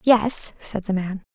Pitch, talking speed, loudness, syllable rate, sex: 205 Hz, 180 wpm, -23 LUFS, 3.7 syllables/s, female